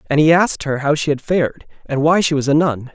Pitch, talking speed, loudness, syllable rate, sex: 150 Hz, 285 wpm, -16 LUFS, 6.0 syllables/s, male